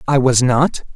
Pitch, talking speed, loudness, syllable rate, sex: 130 Hz, 190 wpm, -15 LUFS, 4.2 syllables/s, male